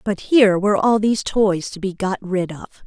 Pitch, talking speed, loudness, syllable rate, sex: 200 Hz, 230 wpm, -18 LUFS, 5.6 syllables/s, female